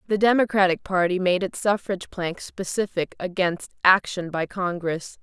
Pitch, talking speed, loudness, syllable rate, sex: 185 Hz, 140 wpm, -23 LUFS, 4.7 syllables/s, female